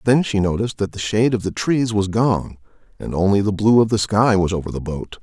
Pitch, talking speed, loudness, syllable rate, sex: 100 Hz, 255 wpm, -19 LUFS, 5.9 syllables/s, male